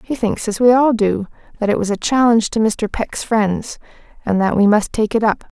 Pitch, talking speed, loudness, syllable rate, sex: 220 Hz, 235 wpm, -17 LUFS, 5.2 syllables/s, female